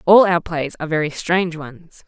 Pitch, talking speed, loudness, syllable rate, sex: 165 Hz, 200 wpm, -18 LUFS, 5.2 syllables/s, female